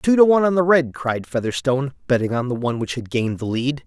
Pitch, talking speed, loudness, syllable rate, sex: 135 Hz, 265 wpm, -20 LUFS, 6.5 syllables/s, male